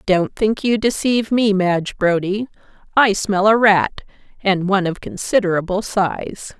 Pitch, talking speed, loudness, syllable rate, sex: 200 Hz, 135 wpm, -18 LUFS, 4.5 syllables/s, female